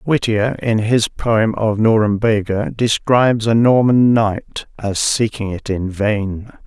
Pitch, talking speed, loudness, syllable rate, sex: 110 Hz, 135 wpm, -16 LUFS, 3.6 syllables/s, male